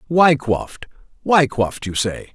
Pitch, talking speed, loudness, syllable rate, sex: 125 Hz, 100 wpm, -18 LUFS, 3.8 syllables/s, male